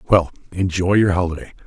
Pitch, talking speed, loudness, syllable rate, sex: 90 Hz, 145 wpm, -19 LUFS, 6.3 syllables/s, male